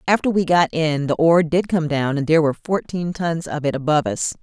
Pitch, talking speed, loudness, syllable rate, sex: 160 Hz, 245 wpm, -19 LUFS, 5.9 syllables/s, female